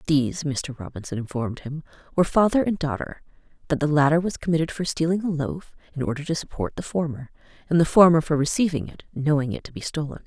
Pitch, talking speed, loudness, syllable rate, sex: 150 Hz, 205 wpm, -23 LUFS, 6.3 syllables/s, female